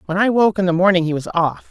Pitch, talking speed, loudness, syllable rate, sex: 185 Hz, 315 wpm, -17 LUFS, 6.4 syllables/s, female